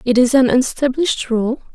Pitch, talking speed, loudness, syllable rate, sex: 255 Hz, 170 wpm, -16 LUFS, 5.2 syllables/s, female